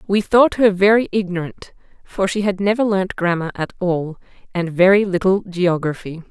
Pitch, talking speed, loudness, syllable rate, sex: 190 Hz, 160 wpm, -18 LUFS, 4.9 syllables/s, female